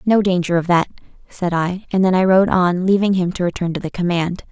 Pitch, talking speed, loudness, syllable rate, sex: 180 Hz, 240 wpm, -17 LUFS, 5.6 syllables/s, female